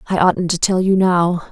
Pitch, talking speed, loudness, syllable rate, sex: 180 Hz, 235 wpm, -16 LUFS, 4.8 syllables/s, female